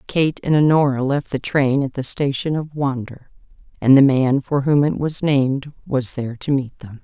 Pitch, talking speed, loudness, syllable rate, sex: 140 Hz, 205 wpm, -19 LUFS, 4.8 syllables/s, female